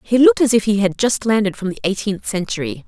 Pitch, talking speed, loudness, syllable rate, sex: 205 Hz, 250 wpm, -17 LUFS, 6.3 syllables/s, female